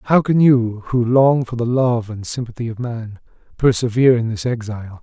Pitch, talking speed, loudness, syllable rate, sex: 120 Hz, 190 wpm, -18 LUFS, 5.0 syllables/s, male